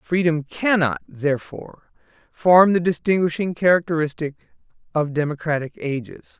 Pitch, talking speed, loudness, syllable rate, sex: 160 Hz, 95 wpm, -20 LUFS, 4.9 syllables/s, male